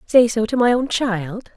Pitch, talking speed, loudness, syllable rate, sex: 225 Hz, 230 wpm, -18 LUFS, 4.6 syllables/s, female